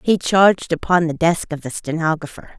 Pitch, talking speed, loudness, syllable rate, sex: 165 Hz, 185 wpm, -18 LUFS, 5.4 syllables/s, female